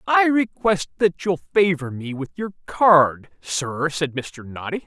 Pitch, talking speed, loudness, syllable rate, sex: 170 Hz, 160 wpm, -21 LUFS, 3.6 syllables/s, male